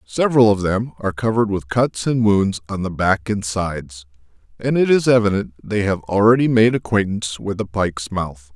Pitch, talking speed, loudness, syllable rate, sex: 100 Hz, 190 wpm, -18 LUFS, 5.3 syllables/s, male